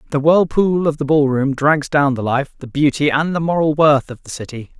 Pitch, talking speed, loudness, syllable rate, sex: 145 Hz, 240 wpm, -16 LUFS, 5.2 syllables/s, male